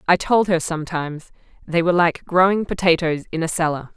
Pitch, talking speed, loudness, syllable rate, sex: 170 Hz, 180 wpm, -19 LUFS, 5.8 syllables/s, female